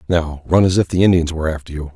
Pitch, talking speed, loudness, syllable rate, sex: 85 Hz, 275 wpm, -17 LUFS, 6.9 syllables/s, male